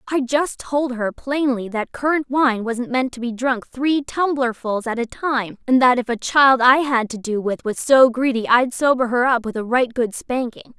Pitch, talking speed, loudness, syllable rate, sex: 250 Hz, 220 wpm, -19 LUFS, 4.5 syllables/s, female